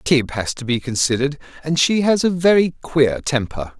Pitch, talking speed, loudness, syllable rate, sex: 145 Hz, 190 wpm, -18 LUFS, 5.1 syllables/s, male